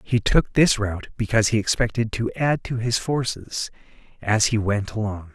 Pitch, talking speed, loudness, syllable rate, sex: 110 Hz, 180 wpm, -22 LUFS, 4.9 syllables/s, male